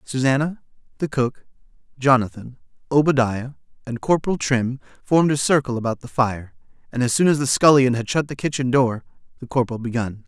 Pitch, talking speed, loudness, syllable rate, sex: 130 Hz, 160 wpm, -20 LUFS, 5.7 syllables/s, male